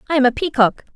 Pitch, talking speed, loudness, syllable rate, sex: 265 Hz, 250 wpm, -17 LUFS, 7.6 syllables/s, female